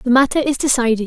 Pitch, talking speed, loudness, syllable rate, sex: 255 Hz, 225 wpm, -16 LUFS, 6.5 syllables/s, female